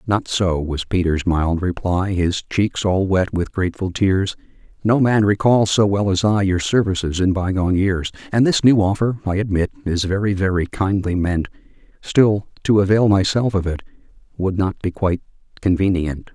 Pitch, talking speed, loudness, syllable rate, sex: 95 Hz, 175 wpm, -19 LUFS, 4.8 syllables/s, male